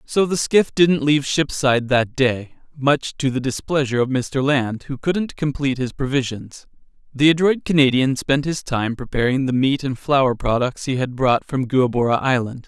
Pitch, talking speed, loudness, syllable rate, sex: 135 Hz, 180 wpm, -19 LUFS, 4.8 syllables/s, male